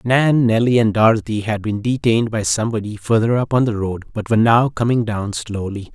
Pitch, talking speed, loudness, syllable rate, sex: 110 Hz, 200 wpm, -18 LUFS, 5.6 syllables/s, male